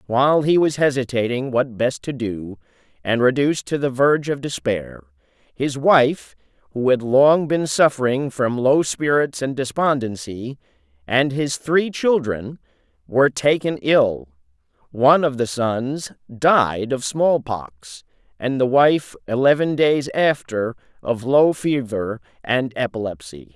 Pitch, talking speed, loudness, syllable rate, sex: 130 Hz, 135 wpm, -19 LUFS, 4.0 syllables/s, male